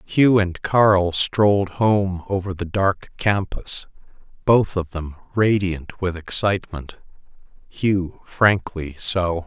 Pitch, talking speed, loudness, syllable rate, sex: 95 Hz, 115 wpm, -20 LUFS, 3.3 syllables/s, male